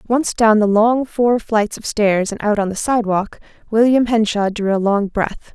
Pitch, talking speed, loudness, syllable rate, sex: 215 Hz, 205 wpm, -17 LUFS, 4.5 syllables/s, female